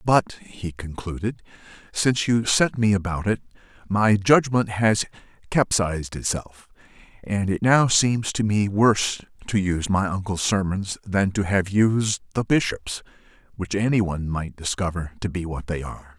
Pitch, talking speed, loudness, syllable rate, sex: 100 Hz, 150 wpm, -23 LUFS, 4.5 syllables/s, male